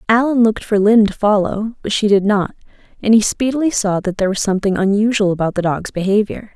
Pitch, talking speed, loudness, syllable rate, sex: 210 Hz, 210 wpm, -16 LUFS, 6.4 syllables/s, female